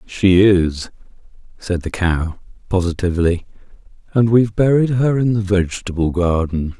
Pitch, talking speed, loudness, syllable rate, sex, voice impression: 95 Hz, 125 wpm, -17 LUFS, 4.7 syllables/s, male, masculine, adult-like, relaxed, slightly soft, slightly muffled, raspy, slightly intellectual, slightly friendly, wild, strict, slightly sharp